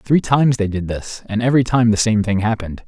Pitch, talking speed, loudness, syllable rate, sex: 110 Hz, 250 wpm, -17 LUFS, 6.3 syllables/s, male